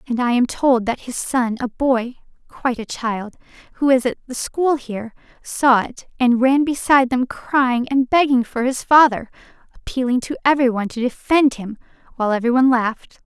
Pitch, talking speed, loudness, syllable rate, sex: 250 Hz, 185 wpm, -18 LUFS, 5.3 syllables/s, female